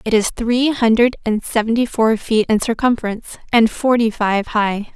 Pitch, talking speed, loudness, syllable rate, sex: 225 Hz, 170 wpm, -17 LUFS, 4.8 syllables/s, female